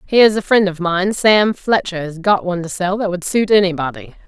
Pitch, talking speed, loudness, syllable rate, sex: 190 Hz, 240 wpm, -16 LUFS, 5.7 syllables/s, female